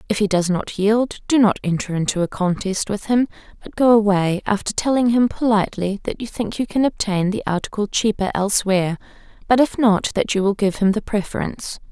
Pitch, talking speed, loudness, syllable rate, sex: 205 Hz, 200 wpm, -19 LUFS, 5.6 syllables/s, female